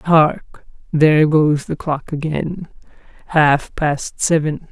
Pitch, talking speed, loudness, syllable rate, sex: 155 Hz, 100 wpm, -17 LUFS, 3.2 syllables/s, female